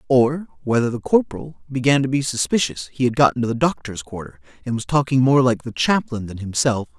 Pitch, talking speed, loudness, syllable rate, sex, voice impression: 130 Hz, 205 wpm, -20 LUFS, 5.8 syllables/s, male, masculine, adult-like, tensed, clear, fluent, cool, intellectual, slightly sincere, elegant, strict, sharp